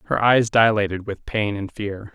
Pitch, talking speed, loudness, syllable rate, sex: 105 Hz, 195 wpm, -21 LUFS, 4.6 syllables/s, male